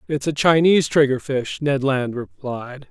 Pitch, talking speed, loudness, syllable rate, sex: 140 Hz, 145 wpm, -19 LUFS, 4.4 syllables/s, male